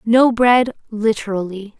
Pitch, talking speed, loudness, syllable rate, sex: 220 Hz, 100 wpm, -16 LUFS, 3.9 syllables/s, female